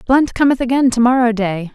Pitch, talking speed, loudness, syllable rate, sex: 240 Hz, 205 wpm, -15 LUFS, 5.6 syllables/s, female